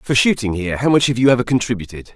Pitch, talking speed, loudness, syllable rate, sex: 120 Hz, 250 wpm, -17 LUFS, 7.3 syllables/s, male